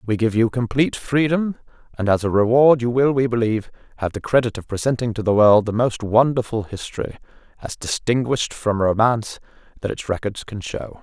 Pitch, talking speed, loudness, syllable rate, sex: 115 Hz, 185 wpm, -20 LUFS, 5.6 syllables/s, male